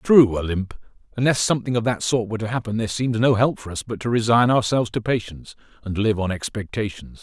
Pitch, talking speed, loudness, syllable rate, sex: 110 Hz, 215 wpm, -21 LUFS, 6.4 syllables/s, male